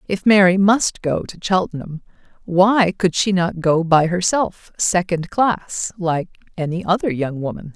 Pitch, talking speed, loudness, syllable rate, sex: 180 Hz, 155 wpm, -18 LUFS, 4.2 syllables/s, female